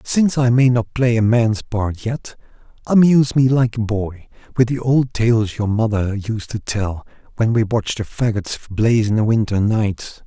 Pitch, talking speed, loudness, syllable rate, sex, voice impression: 115 Hz, 195 wpm, -18 LUFS, 4.6 syllables/s, male, masculine, adult-like, slightly relaxed, slightly weak, soft, raspy, intellectual, calm, mature, reassuring, wild, lively, slightly kind, modest